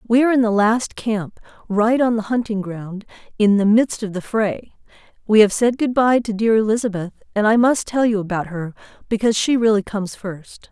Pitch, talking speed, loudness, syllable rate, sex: 215 Hz, 205 wpm, -18 LUFS, 5.3 syllables/s, female